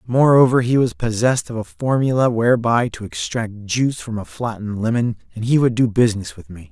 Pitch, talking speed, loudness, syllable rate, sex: 115 Hz, 195 wpm, -18 LUFS, 5.8 syllables/s, male